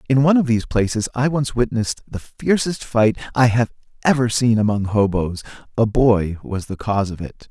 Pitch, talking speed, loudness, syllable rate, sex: 115 Hz, 190 wpm, -19 LUFS, 5.3 syllables/s, male